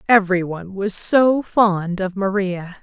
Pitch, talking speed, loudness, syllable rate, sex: 195 Hz, 125 wpm, -19 LUFS, 3.8 syllables/s, female